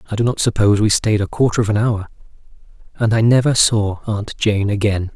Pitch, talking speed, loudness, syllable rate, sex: 110 Hz, 210 wpm, -17 LUFS, 5.7 syllables/s, male